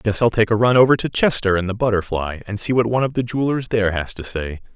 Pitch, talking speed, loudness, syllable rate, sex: 110 Hz, 275 wpm, -19 LUFS, 6.6 syllables/s, male